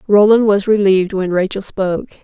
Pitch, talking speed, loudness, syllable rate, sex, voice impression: 200 Hz, 160 wpm, -14 LUFS, 5.7 syllables/s, female, feminine, adult-like, slightly powerful, slightly hard, clear, fluent, slightly sincere, reassuring, slightly sharp